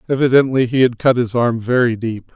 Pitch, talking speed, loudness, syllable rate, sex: 120 Hz, 205 wpm, -16 LUFS, 5.5 syllables/s, male